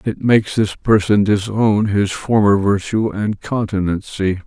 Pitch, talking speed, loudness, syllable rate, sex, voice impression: 105 Hz, 135 wpm, -17 LUFS, 4.2 syllables/s, male, very masculine, very adult-like, very old, very thick, very relaxed, very weak, dark, very soft, very muffled, very halting, raspy, cool, intellectual, very sincere, very calm, very mature, friendly, reassuring, slightly unique, slightly elegant, very wild, very kind, very modest